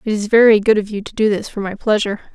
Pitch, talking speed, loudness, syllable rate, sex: 210 Hz, 305 wpm, -16 LUFS, 7.0 syllables/s, female